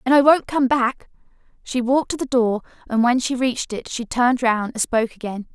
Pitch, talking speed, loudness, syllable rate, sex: 245 Hz, 225 wpm, -20 LUFS, 5.7 syllables/s, female